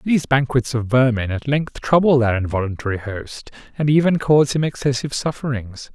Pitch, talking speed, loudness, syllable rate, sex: 130 Hz, 160 wpm, -19 LUFS, 5.6 syllables/s, male